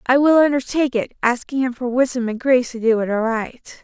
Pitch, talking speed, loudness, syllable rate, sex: 250 Hz, 220 wpm, -19 LUFS, 5.8 syllables/s, female